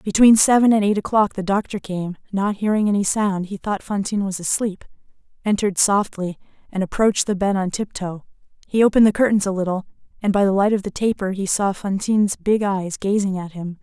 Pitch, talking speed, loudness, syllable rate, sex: 200 Hz, 200 wpm, -20 LUFS, 5.8 syllables/s, female